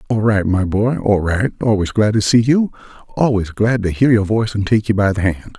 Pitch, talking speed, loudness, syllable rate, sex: 105 Hz, 225 wpm, -16 LUFS, 5.3 syllables/s, male